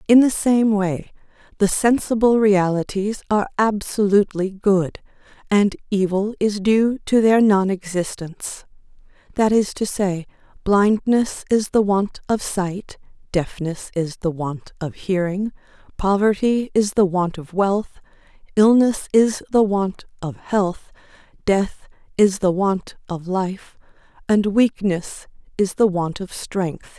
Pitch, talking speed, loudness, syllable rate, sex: 200 Hz, 125 wpm, -20 LUFS, 3.8 syllables/s, female